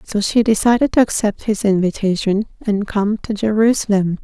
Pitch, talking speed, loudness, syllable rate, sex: 210 Hz, 155 wpm, -17 LUFS, 5.2 syllables/s, female